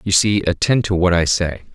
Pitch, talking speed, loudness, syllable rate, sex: 95 Hz, 240 wpm, -17 LUFS, 5.1 syllables/s, male